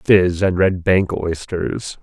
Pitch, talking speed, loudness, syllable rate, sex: 90 Hz, 150 wpm, -18 LUFS, 3.1 syllables/s, male